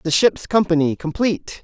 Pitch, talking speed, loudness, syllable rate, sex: 175 Hz, 145 wpm, -19 LUFS, 5.2 syllables/s, male